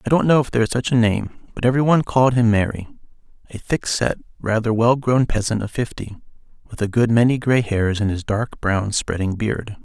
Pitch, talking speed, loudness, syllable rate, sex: 115 Hz, 215 wpm, -19 LUFS, 5.8 syllables/s, male